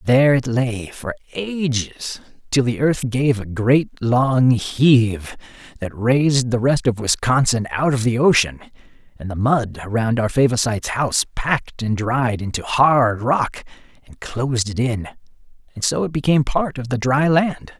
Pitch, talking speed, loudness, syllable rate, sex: 125 Hz, 165 wpm, -19 LUFS, 4.5 syllables/s, male